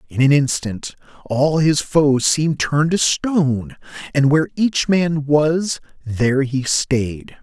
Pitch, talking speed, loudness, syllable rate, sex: 145 Hz, 145 wpm, -18 LUFS, 3.9 syllables/s, male